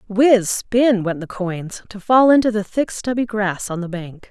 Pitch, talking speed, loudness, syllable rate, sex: 210 Hz, 180 wpm, -18 LUFS, 4.2 syllables/s, female